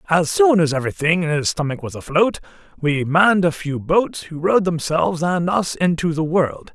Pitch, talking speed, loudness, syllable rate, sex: 165 Hz, 195 wpm, -19 LUFS, 5.2 syllables/s, male